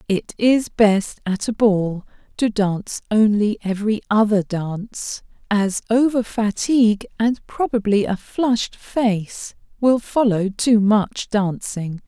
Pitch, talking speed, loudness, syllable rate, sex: 215 Hz, 125 wpm, -19 LUFS, 3.7 syllables/s, female